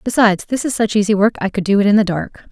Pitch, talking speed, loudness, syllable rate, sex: 210 Hz, 310 wpm, -16 LUFS, 7.0 syllables/s, female